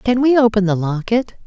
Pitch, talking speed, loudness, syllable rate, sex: 220 Hz, 205 wpm, -16 LUFS, 5.1 syllables/s, female